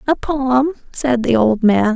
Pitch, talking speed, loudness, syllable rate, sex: 245 Hz, 185 wpm, -16 LUFS, 3.6 syllables/s, female